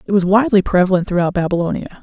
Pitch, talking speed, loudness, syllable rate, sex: 190 Hz, 180 wpm, -16 LUFS, 7.5 syllables/s, female